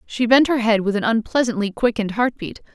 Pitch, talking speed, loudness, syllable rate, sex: 225 Hz, 220 wpm, -19 LUFS, 5.9 syllables/s, female